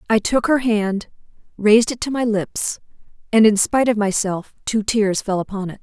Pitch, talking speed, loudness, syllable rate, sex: 215 Hz, 195 wpm, -19 LUFS, 5.0 syllables/s, female